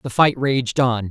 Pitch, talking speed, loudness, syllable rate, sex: 125 Hz, 215 wpm, -19 LUFS, 3.7 syllables/s, male